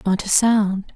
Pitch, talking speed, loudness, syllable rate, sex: 205 Hz, 190 wpm, -18 LUFS, 3.6 syllables/s, female